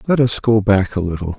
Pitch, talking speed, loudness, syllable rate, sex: 105 Hz, 260 wpm, -16 LUFS, 5.7 syllables/s, male